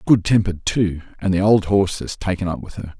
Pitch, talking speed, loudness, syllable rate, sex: 95 Hz, 240 wpm, -19 LUFS, 6.0 syllables/s, male